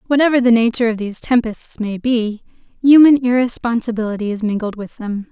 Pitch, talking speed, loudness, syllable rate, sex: 230 Hz, 160 wpm, -16 LUFS, 5.9 syllables/s, female